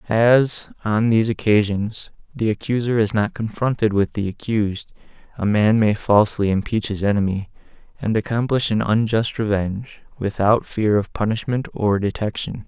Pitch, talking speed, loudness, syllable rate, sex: 110 Hz, 140 wpm, -20 LUFS, 4.9 syllables/s, male